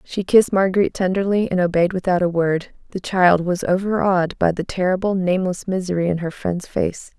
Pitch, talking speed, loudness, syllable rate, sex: 185 Hz, 185 wpm, -19 LUFS, 5.7 syllables/s, female